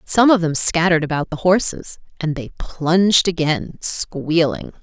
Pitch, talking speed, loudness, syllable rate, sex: 170 Hz, 150 wpm, -18 LUFS, 4.4 syllables/s, female